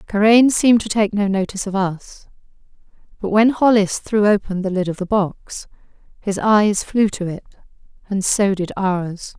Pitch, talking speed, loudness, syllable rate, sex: 200 Hz, 165 wpm, -18 LUFS, 4.7 syllables/s, female